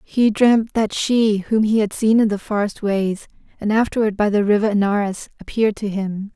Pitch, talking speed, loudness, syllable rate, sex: 210 Hz, 200 wpm, -19 LUFS, 5.1 syllables/s, female